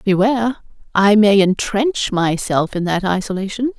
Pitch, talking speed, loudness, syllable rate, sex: 205 Hz, 110 wpm, -17 LUFS, 4.6 syllables/s, female